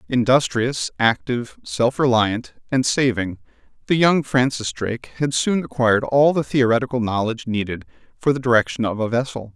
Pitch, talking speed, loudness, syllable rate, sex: 120 Hz, 150 wpm, -20 LUFS, 5.2 syllables/s, male